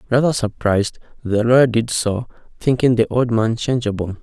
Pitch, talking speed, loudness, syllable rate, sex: 115 Hz, 155 wpm, -18 LUFS, 5.3 syllables/s, male